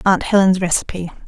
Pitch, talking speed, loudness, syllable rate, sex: 185 Hz, 140 wpm, -16 LUFS, 5.8 syllables/s, female